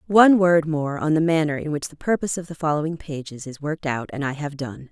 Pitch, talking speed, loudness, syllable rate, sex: 155 Hz, 245 wpm, -22 LUFS, 6.1 syllables/s, female